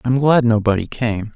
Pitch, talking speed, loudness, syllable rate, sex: 115 Hz, 180 wpm, -17 LUFS, 4.8 syllables/s, male